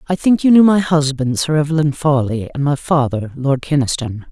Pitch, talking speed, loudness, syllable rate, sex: 145 Hz, 195 wpm, -16 LUFS, 5.2 syllables/s, female